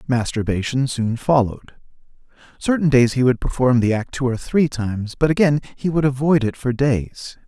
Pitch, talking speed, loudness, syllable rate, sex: 130 Hz, 175 wpm, -19 LUFS, 5.1 syllables/s, male